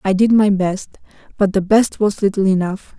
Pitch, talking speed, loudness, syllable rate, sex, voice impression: 200 Hz, 200 wpm, -16 LUFS, 5.0 syllables/s, female, feminine, adult-like, slightly soft, slightly fluent, slightly refreshing, sincere, kind